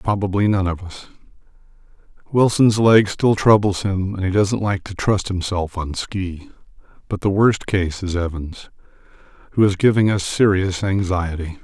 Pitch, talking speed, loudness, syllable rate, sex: 95 Hz, 155 wpm, -19 LUFS, 4.5 syllables/s, male